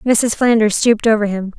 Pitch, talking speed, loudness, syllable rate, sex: 220 Hz, 190 wpm, -14 LUFS, 5.3 syllables/s, female